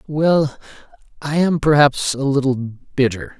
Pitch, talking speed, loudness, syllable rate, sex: 140 Hz, 125 wpm, -18 LUFS, 4.4 syllables/s, male